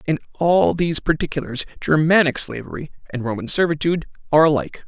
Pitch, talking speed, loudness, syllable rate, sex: 150 Hz, 135 wpm, -19 LUFS, 6.5 syllables/s, male